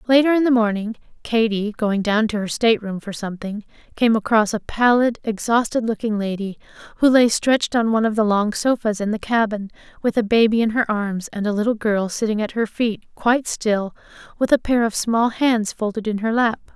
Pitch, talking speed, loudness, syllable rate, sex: 220 Hz, 205 wpm, -20 LUFS, 5.5 syllables/s, female